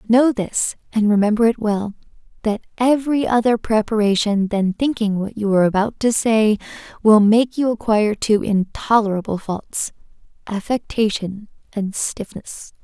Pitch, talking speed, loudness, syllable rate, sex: 215 Hz, 130 wpm, -19 LUFS, 4.6 syllables/s, female